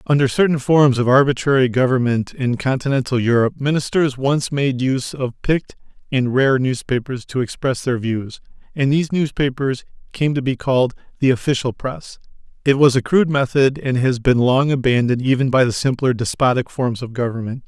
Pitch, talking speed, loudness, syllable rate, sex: 130 Hz, 170 wpm, -18 LUFS, 5.4 syllables/s, male